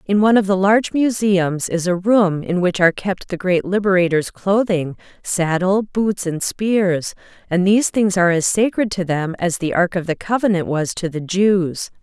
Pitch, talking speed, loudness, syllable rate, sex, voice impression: 190 Hz, 195 wpm, -18 LUFS, 4.7 syllables/s, female, feminine, adult-like, slightly intellectual, slightly calm, elegant